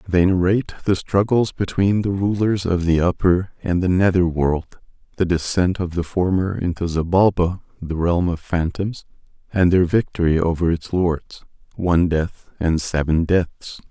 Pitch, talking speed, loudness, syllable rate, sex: 90 Hz, 155 wpm, -20 LUFS, 4.5 syllables/s, male